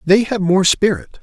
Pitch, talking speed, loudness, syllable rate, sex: 190 Hz, 195 wpm, -15 LUFS, 4.4 syllables/s, male